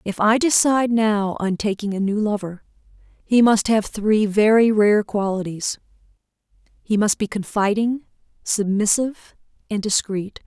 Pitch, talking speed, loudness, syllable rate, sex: 210 Hz, 130 wpm, -20 LUFS, 4.5 syllables/s, female